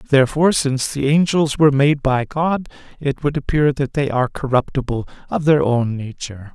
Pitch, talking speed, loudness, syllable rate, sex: 135 Hz, 175 wpm, -18 LUFS, 5.4 syllables/s, male